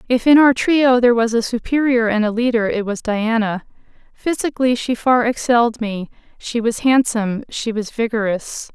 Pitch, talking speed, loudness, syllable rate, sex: 235 Hz, 170 wpm, -17 LUFS, 5.0 syllables/s, female